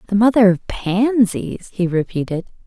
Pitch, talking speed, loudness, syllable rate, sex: 200 Hz, 135 wpm, -18 LUFS, 4.4 syllables/s, female